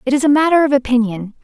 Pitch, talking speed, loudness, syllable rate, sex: 265 Hz, 250 wpm, -14 LUFS, 7.1 syllables/s, female